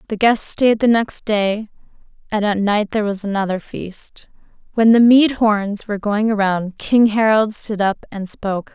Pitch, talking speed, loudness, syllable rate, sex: 210 Hz, 180 wpm, -17 LUFS, 4.4 syllables/s, female